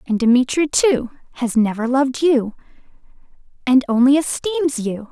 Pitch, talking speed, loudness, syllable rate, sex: 260 Hz, 130 wpm, -17 LUFS, 4.4 syllables/s, female